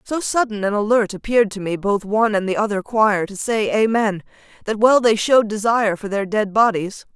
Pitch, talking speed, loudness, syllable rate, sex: 215 Hz, 210 wpm, -18 LUFS, 5.5 syllables/s, female